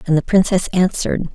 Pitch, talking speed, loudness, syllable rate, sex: 180 Hz, 180 wpm, -17 LUFS, 6.0 syllables/s, female